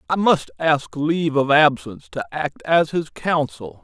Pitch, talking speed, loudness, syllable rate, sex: 145 Hz, 170 wpm, -20 LUFS, 4.3 syllables/s, male